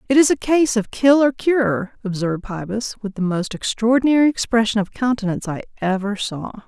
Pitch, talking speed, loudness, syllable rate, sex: 225 Hz, 180 wpm, -19 LUFS, 5.4 syllables/s, female